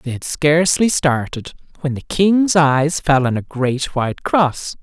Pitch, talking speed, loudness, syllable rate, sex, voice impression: 150 Hz, 175 wpm, -17 LUFS, 4.0 syllables/s, male, slightly masculine, adult-like, refreshing, slightly unique, slightly lively